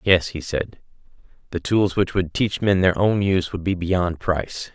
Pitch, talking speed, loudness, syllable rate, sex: 90 Hz, 200 wpm, -21 LUFS, 4.6 syllables/s, male